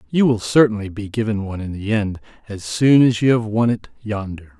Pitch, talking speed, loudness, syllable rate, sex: 110 Hz, 220 wpm, -19 LUFS, 5.5 syllables/s, male